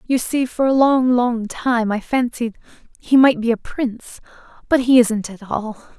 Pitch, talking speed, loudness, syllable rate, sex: 240 Hz, 190 wpm, -18 LUFS, 4.3 syllables/s, female